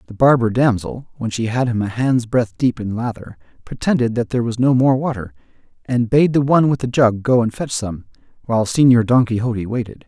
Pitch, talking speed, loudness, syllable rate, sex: 120 Hz, 215 wpm, -17 LUFS, 5.7 syllables/s, male